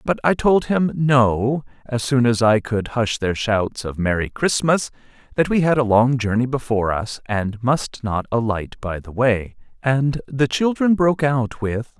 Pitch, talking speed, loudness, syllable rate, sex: 125 Hz, 185 wpm, -20 LUFS, 4.2 syllables/s, male